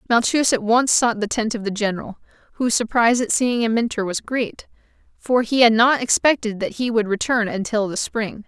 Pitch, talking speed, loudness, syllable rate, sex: 225 Hz, 205 wpm, -19 LUFS, 5.4 syllables/s, female